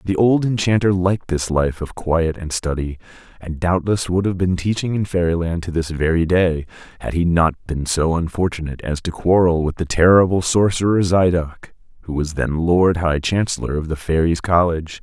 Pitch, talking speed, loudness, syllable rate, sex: 85 Hz, 185 wpm, -19 LUFS, 5.1 syllables/s, male